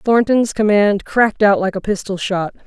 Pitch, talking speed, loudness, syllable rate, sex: 205 Hz, 180 wpm, -16 LUFS, 4.7 syllables/s, female